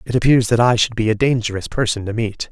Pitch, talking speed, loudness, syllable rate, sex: 115 Hz, 260 wpm, -17 LUFS, 6.3 syllables/s, male